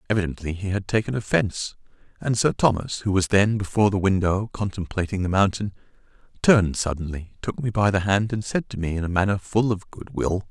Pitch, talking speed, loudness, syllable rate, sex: 100 Hz, 200 wpm, -23 LUFS, 5.8 syllables/s, male